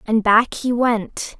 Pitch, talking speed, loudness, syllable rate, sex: 225 Hz, 170 wpm, -18 LUFS, 3.2 syllables/s, female